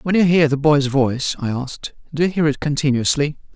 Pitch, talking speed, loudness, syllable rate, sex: 145 Hz, 220 wpm, -18 LUFS, 5.8 syllables/s, male